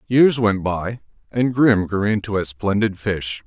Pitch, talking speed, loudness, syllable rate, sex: 100 Hz, 175 wpm, -20 LUFS, 4.0 syllables/s, male